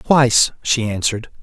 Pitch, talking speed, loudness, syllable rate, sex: 120 Hz, 125 wpm, -16 LUFS, 5.0 syllables/s, male